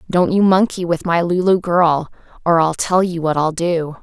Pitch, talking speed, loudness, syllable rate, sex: 170 Hz, 210 wpm, -16 LUFS, 4.6 syllables/s, female